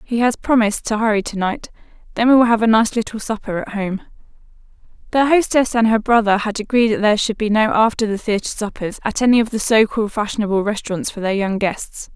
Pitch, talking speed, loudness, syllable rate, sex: 220 Hz, 210 wpm, -17 LUFS, 6.1 syllables/s, female